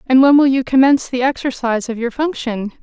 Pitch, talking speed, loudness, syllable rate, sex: 255 Hz, 210 wpm, -15 LUFS, 6.1 syllables/s, female